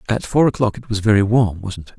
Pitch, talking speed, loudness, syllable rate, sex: 105 Hz, 240 wpm, -17 LUFS, 6.0 syllables/s, male